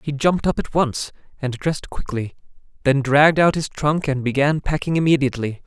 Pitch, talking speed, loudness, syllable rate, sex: 145 Hz, 180 wpm, -20 LUFS, 5.7 syllables/s, male